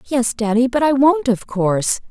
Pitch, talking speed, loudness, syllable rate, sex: 245 Hz, 200 wpm, -17 LUFS, 4.7 syllables/s, female